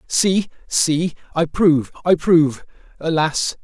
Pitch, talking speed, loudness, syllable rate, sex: 160 Hz, 115 wpm, -18 LUFS, 3.9 syllables/s, male